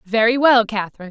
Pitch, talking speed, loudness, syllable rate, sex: 225 Hz, 165 wpm, -16 LUFS, 6.6 syllables/s, female